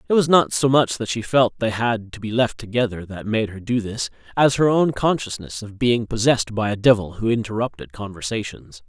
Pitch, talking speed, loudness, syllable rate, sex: 115 Hz, 215 wpm, -21 LUFS, 5.4 syllables/s, male